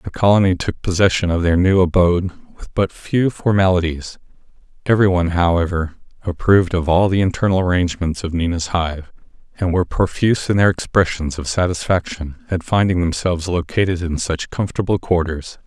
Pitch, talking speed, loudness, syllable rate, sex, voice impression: 90 Hz, 150 wpm, -18 LUFS, 5.7 syllables/s, male, masculine, middle-aged, thick, tensed, slightly dark, clear, cool, sincere, calm, mature, friendly, reassuring, wild, kind, modest